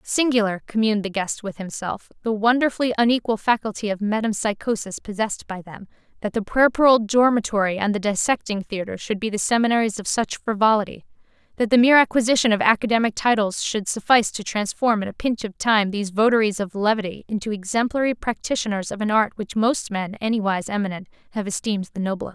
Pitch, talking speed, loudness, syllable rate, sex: 215 Hz, 175 wpm, -21 LUFS, 6.1 syllables/s, female